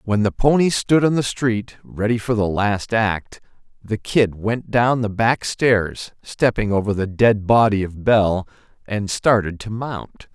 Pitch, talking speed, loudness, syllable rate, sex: 110 Hz, 175 wpm, -19 LUFS, 3.9 syllables/s, male